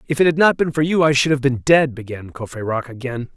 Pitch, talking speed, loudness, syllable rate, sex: 135 Hz, 270 wpm, -18 LUFS, 5.9 syllables/s, male